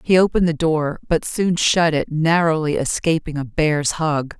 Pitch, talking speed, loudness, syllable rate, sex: 160 Hz, 175 wpm, -19 LUFS, 4.5 syllables/s, female